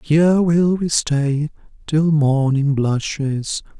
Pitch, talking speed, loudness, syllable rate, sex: 150 Hz, 110 wpm, -18 LUFS, 3.1 syllables/s, male